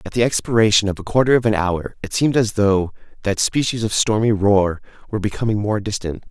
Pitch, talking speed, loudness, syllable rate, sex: 105 Hz, 210 wpm, -19 LUFS, 6.0 syllables/s, male